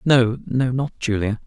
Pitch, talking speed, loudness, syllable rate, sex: 120 Hz, 125 wpm, -21 LUFS, 3.3 syllables/s, male